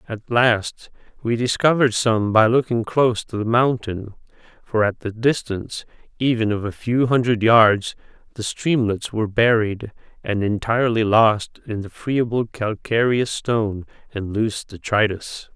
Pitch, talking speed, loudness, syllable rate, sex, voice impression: 110 Hz, 140 wpm, -20 LUFS, 4.4 syllables/s, male, masculine, middle-aged, tensed, powerful, slightly muffled, sincere, calm, friendly, wild, lively, kind, modest